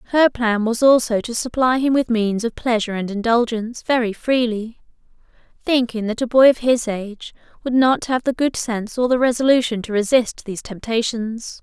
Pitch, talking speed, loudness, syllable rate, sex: 235 Hz, 180 wpm, -19 LUFS, 5.1 syllables/s, female